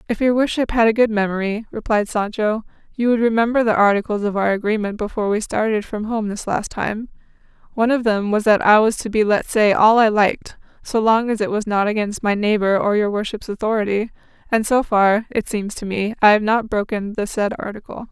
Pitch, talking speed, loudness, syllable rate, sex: 215 Hz, 220 wpm, -18 LUFS, 5.6 syllables/s, female